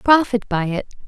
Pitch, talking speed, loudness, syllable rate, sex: 220 Hz, 165 wpm, -19 LUFS, 5.0 syllables/s, female